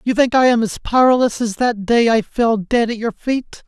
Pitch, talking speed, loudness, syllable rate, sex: 230 Hz, 245 wpm, -16 LUFS, 4.8 syllables/s, male